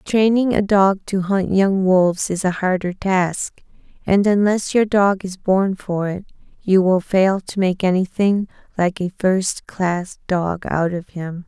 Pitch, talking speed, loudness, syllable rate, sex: 190 Hz, 170 wpm, -18 LUFS, 3.9 syllables/s, female